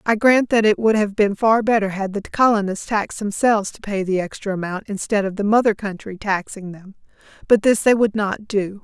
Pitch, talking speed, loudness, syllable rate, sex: 205 Hz, 215 wpm, -19 LUFS, 5.4 syllables/s, female